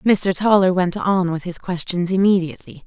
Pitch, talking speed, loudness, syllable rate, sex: 185 Hz, 165 wpm, -18 LUFS, 5.0 syllables/s, female